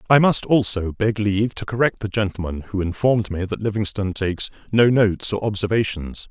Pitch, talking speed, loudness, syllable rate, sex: 105 Hz, 180 wpm, -21 LUFS, 5.8 syllables/s, male